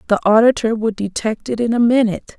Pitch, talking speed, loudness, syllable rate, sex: 225 Hz, 200 wpm, -16 LUFS, 6.1 syllables/s, female